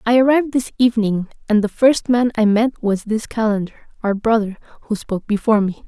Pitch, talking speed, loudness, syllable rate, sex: 220 Hz, 195 wpm, -18 LUFS, 5.9 syllables/s, female